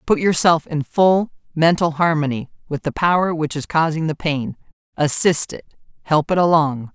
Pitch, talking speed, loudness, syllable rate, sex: 160 Hz, 165 wpm, -18 LUFS, 4.7 syllables/s, female